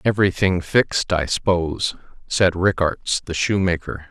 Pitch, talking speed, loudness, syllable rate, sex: 90 Hz, 115 wpm, -20 LUFS, 4.4 syllables/s, male